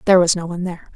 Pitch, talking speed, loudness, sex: 175 Hz, 315 wpm, -19 LUFS, female